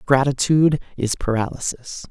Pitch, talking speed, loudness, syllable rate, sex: 130 Hz, 85 wpm, -20 LUFS, 5.1 syllables/s, male